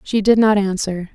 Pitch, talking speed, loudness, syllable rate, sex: 200 Hz, 210 wpm, -16 LUFS, 4.9 syllables/s, female